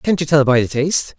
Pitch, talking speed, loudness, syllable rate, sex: 145 Hz, 305 wpm, -16 LUFS, 6.1 syllables/s, male